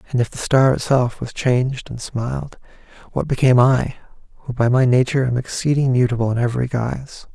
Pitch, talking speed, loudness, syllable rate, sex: 125 Hz, 180 wpm, -19 LUFS, 6.0 syllables/s, male